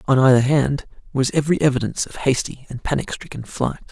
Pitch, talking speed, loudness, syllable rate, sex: 135 Hz, 185 wpm, -20 LUFS, 6.1 syllables/s, male